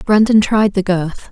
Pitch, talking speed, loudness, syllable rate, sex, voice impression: 200 Hz, 180 wpm, -14 LUFS, 4.2 syllables/s, female, very feminine, very adult-like, slightly thin, slightly relaxed, slightly weak, slightly bright, soft, clear, fluent, slightly raspy, cute, intellectual, refreshing, very sincere, very calm, friendly, reassuring, slightly unique, elegant, slightly wild, sweet, slightly lively, kind, modest, slightly light